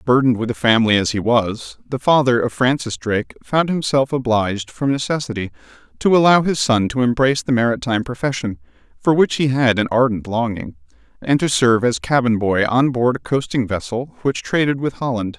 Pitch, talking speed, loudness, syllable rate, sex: 125 Hz, 185 wpm, -18 LUFS, 5.6 syllables/s, male